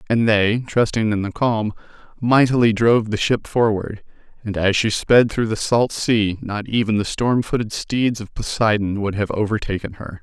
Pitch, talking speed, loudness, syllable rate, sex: 110 Hz, 180 wpm, -19 LUFS, 4.8 syllables/s, male